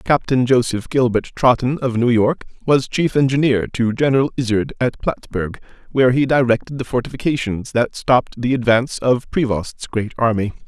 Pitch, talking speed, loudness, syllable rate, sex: 125 Hz, 155 wpm, -18 LUFS, 5.1 syllables/s, male